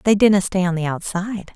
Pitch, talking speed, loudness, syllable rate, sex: 190 Hz, 230 wpm, -19 LUFS, 6.3 syllables/s, female